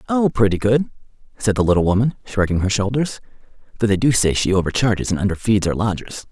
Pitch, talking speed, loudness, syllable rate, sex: 105 Hz, 190 wpm, -19 LUFS, 6.2 syllables/s, male